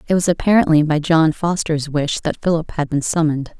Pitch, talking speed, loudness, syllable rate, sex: 160 Hz, 200 wpm, -17 LUFS, 5.6 syllables/s, female